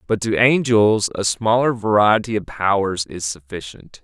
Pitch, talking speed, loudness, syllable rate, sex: 105 Hz, 150 wpm, -18 LUFS, 4.4 syllables/s, male